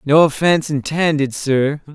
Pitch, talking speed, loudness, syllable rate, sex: 150 Hz, 125 wpm, -17 LUFS, 4.6 syllables/s, male